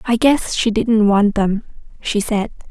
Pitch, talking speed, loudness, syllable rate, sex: 215 Hz, 175 wpm, -17 LUFS, 3.9 syllables/s, female